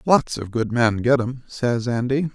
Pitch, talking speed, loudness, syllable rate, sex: 125 Hz, 205 wpm, -21 LUFS, 4.1 syllables/s, male